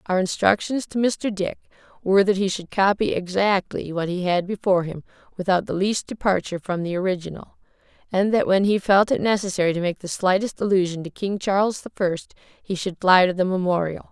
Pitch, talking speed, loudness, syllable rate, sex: 190 Hz, 195 wpm, -22 LUFS, 5.6 syllables/s, female